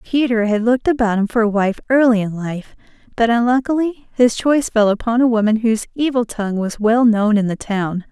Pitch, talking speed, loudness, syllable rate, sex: 230 Hz, 205 wpm, -17 LUFS, 5.6 syllables/s, female